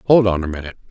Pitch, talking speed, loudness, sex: 95 Hz, 265 wpm, -18 LUFS, male